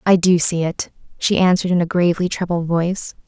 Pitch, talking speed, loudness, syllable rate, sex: 175 Hz, 200 wpm, -18 LUFS, 6.1 syllables/s, female